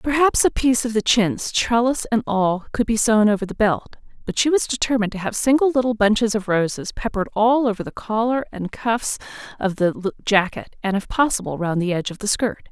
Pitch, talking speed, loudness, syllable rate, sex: 220 Hz, 210 wpm, -20 LUFS, 5.6 syllables/s, female